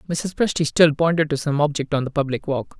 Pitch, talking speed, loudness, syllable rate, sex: 150 Hz, 235 wpm, -20 LUFS, 5.8 syllables/s, male